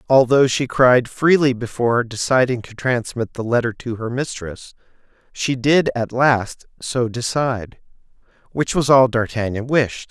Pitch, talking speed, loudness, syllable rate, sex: 125 Hz, 140 wpm, -18 LUFS, 4.4 syllables/s, male